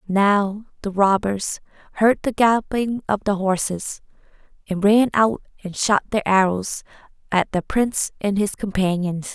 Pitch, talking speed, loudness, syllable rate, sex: 200 Hz, 140 wpm, -20 LUFS, 4.3 syllables/s, female